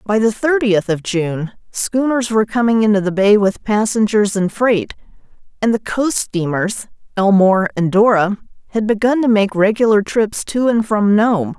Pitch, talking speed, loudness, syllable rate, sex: 210 Hz, 165 wpm, -15 LUFS, 4.6 syllables/s, female